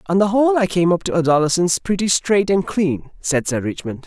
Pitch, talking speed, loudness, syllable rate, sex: 180 Hz, 220 wpm, -18 LUFS, 5.7 syllables/s, male